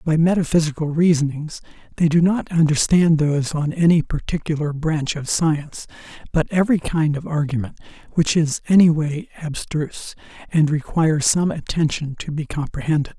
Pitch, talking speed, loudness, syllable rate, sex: 155 Hz, 140 wpm, -20 LUFS, 5.2 syllables/s, male